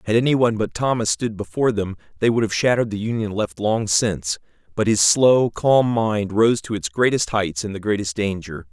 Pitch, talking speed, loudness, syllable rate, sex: 105 Hz, 205 wpm, -20 LUFS, 5.3 syllables/s, male